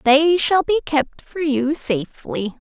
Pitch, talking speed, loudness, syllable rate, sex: 285 Hz, 155 wpm, -19 LUFS, 3.8 syllables/s, female